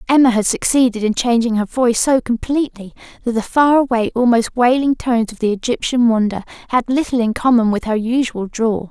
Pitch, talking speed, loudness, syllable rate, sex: 235 Hz, 190 wpm, -16 LUFS, 5.7 syllables/s, female